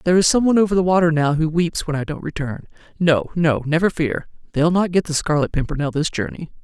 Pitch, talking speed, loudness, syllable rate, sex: 165 Hz, 210 wpm, -19 LUFS, 6.3 syllables/s, female